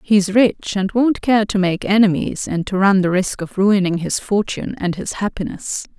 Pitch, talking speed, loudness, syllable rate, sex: 195 Hz, 200 wpm, -18 LUFS, 4.7 syllables/s, female